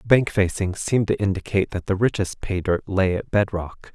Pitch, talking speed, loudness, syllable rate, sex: 95 Hz, 215 wpm, -22 LUFS, 5.2 syllables/s, male